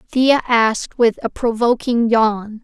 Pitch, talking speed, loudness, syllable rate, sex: 230 Hz, 135 wpm, -16 LUFS, 3.8 syllables/s, female